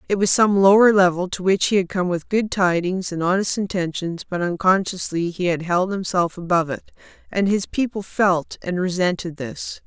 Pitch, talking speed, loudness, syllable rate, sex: 185 Hz, 190 wpm, -20 LUFS, 5.0 syllables/s, female